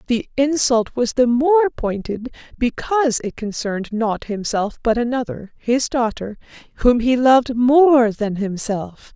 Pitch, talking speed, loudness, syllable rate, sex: 240 Hz, 140 wpm, -18 LUFS, 4.1 syllables/s, female